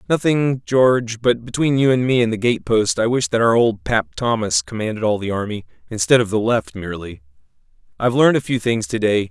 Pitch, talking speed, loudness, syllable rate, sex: 115 Hz, 220 wpm, -18 LUFS, 5.7 syllables/s, male